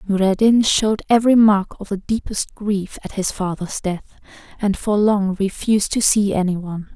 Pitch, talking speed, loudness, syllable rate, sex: 200 Hz, 175 wpm, -18 LUFS, 5.0 syllables/s, female